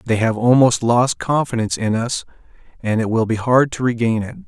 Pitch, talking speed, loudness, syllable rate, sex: 120 Hz, 200 wpm, -18 LUFS, 5.5 syllables/s, male